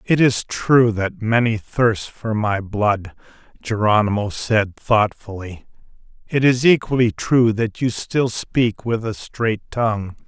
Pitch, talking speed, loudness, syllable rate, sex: 115 Hz, 140 wpm, -19 LUFS, 3.7 syllables/s, male